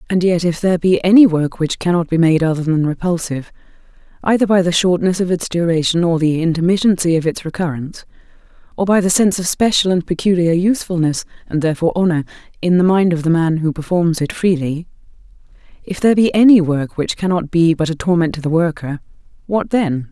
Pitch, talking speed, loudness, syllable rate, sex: 170 Hz, 190 wpm, -16 LUFS, 5.9 syllables/s, female